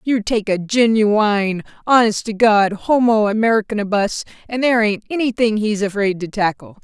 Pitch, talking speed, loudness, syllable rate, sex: 215 Hz, 150 wpm, -17 LUFS, 5.1 syllables/s, female